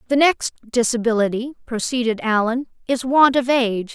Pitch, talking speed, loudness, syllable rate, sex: 240 Hz, 135 wpm, -19 LUFS, 5.2 syllables/s, female